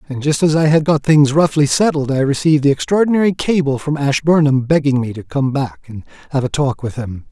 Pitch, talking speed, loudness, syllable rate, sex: 145 Hz, 220 wpm, -15 LUFS, 5.7 syllables/s, male